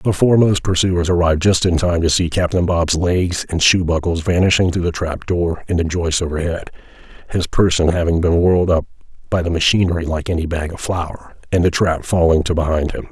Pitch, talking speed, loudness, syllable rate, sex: 85 Hz, 205 wpm, -17 LUFS, 5.5 syllables/s, male